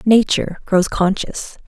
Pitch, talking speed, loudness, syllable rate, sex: 200 Hz, 110 wpm, -17 LUFS, 4.1 syllables/s, female